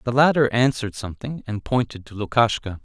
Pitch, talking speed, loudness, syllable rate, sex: 115 Hz, 170 wpm, -22 LUFS, 6.0 syllables/s, male